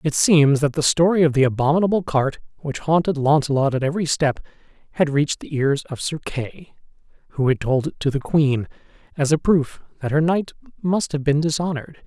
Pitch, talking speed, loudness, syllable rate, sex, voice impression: 150 Hz, 195 wpm, -20 LUFS, 5.5 syllables/s, male, masculine, adult-like, relaxed, weak, slightly dark, slightly muffled, sincere, calm, friendly, kind, modest